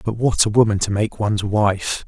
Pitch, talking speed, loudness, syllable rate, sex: 105 Hz, 230 wpm, -19 LUFS, 4.6 syllables/s, male